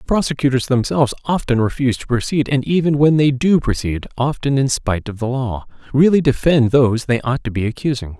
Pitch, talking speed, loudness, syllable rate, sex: 130 Hz, 200 wpm, -17 LUFS, 5.8 syllables/s, male